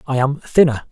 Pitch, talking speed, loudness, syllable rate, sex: 135 Hz, 200 wpm, -17 LUFS, 5.8 syllables/s, male